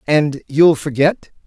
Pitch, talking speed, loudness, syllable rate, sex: 150 Hz, 125 wpm, -15 LUFS, 3.4 syllables/s, male